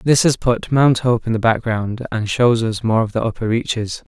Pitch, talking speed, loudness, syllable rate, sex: 115 Hz, 230 wpm, -18 LUFS, 4.9 syllables/s, male